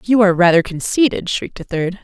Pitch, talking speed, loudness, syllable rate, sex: 190 Hz, 205 wpm, -16 LUFS, 6.3 syllables/s, female